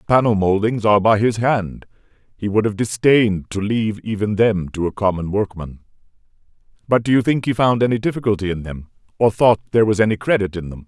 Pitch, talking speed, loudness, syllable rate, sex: 105 Hz, 205 wpm, -18 LUFS, 5.9 syllables/s, male